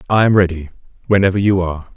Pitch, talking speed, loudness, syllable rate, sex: 95 Hz, 185 wpm, -15 LUFS, 7.3 syllables/s, male